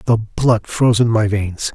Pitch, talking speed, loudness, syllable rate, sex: 110 Hz, 205 wpm, -16 LUFS, 4.4 syllables/s, male